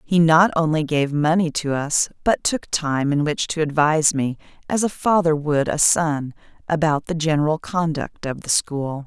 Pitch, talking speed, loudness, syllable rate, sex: 155 Hz, 185 wpm, -20 LUFS, 4.5 syllables/s, female